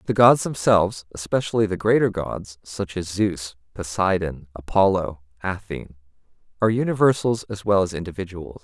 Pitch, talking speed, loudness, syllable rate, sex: 95 Hz, 130 wpm, -22 LUFS, 5.2 syllables/s, male